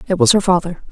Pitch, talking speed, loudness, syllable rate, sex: 185 Hz, 260 wpm, -15 LUFS, 6.9 syllables/s, female